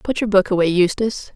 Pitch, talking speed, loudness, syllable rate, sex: 200 Hz, 220 wpm, -18 LUFS, 6.4 syllables/s, female